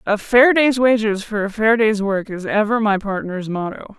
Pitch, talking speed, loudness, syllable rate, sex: 215 Hz, 210 wpm, -17 LUFS, 4.7 syllables/s, female